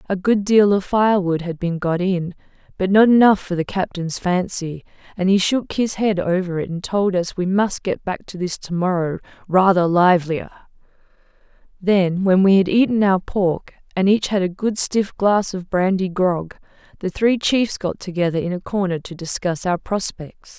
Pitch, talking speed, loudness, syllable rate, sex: 185 Hz, 185 wpm, -19 LUFS, 4.7 syllables/s, female